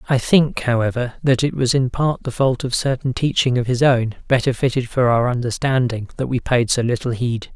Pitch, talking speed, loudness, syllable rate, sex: 125 Hz, 215 wpm, -19 LUFS, 5.3 syllables/s, male